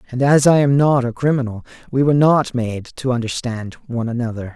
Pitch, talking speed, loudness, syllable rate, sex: 125 Hz, 200 wpm, -18 LUFS, 5.8 syllables/s, male